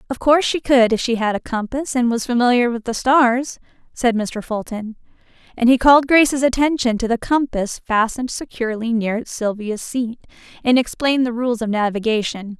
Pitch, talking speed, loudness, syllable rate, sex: 240 Hz, 175 wpm, -18 LUFS, 5.3 syllables/s, female